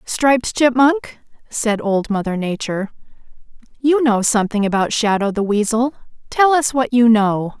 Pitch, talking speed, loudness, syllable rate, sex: 230 Hz, 140 wpm, -17 LUFS, 4.7 syllables/s, female